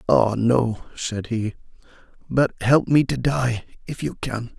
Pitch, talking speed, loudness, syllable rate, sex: 120 Hz, 155 wpm, -22 LUFS, 3.7 syllables/s, male